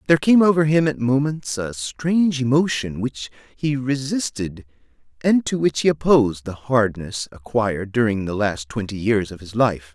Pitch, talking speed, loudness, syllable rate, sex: 125 Hz, 170 wpm, -20 LUFS, 4.8 syllables/s, male